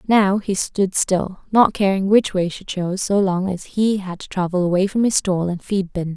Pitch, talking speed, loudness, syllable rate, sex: 190 Hz, 235 wpm, -19 LUFS, 4.8 syllables/s, female